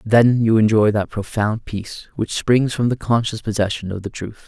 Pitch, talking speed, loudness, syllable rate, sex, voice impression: 110 Hz, 200 wpm, -19 LUFS, 4.9 syllables/s, male, masculine, adult-like, slightly weak, bright, clear, fluent, cool, refreshing, friendly, slightly wild, slightly lively, modest